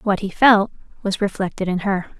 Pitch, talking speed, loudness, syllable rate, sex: 200 Hz, 190 wpm, -19 LUFS, 4.9 syllables/s, female